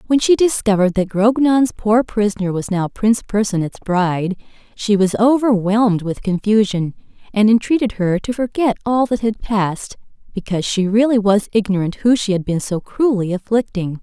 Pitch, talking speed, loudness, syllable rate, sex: 210 Hz, 165 wpm, -17 LUFS, 5.2 syllables/s, female